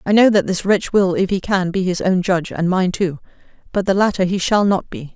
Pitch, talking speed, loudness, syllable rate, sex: 190 Hz, 270 wpm, -17 LUFS, 5.6 syllables/s, female